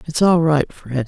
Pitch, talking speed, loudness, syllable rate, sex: 150 Hz, 225 wpm, -17 LUFS, 4.1 syllables/s, female